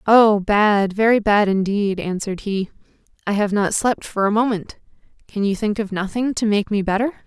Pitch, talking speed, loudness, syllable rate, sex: 210 Hz, 190 wpm, -19 LUFS, 5.0 syllables/s, female